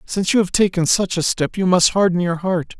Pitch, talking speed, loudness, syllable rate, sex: 180 Hz, 260 wpm, -17 LUFS, 5.6 syllables/s, male